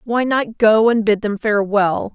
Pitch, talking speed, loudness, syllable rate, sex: 215 Hz, 195 wpm, -16 LUFS, 4.4 syllables/s, female